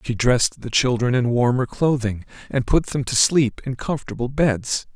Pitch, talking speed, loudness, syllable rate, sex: 125 Hz, 180 wpm, -21 LUFS, 4.9 syllables/s, male